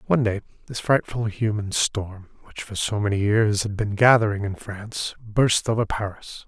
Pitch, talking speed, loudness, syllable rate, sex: 110 Hz, 175 wpm, -23 LUFS, 4.8 syllables/s, male